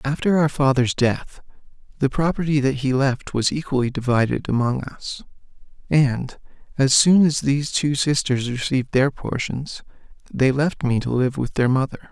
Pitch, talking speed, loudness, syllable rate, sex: 135 Hz, 160 wpm, -20 LUFS, 4.8 syllables/s, male